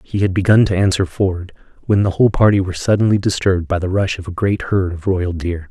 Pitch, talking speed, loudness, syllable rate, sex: 95 Hz, 240 wpm, -17 LUFS, 6.1 syllables/s, male